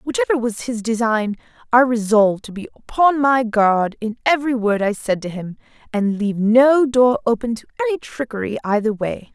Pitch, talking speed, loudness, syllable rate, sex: 240 Hz, 180 wpm, -18 LUFS, 5.3 syllables/s, female